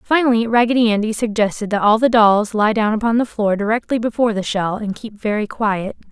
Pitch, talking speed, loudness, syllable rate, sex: 220 Hz, 205 wpm, -17 LUFS, 5.8 syllables/s, female